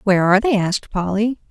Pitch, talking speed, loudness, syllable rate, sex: 205 Hz, 200 wpm, -18 LUFS, 6.8 syllables/s, female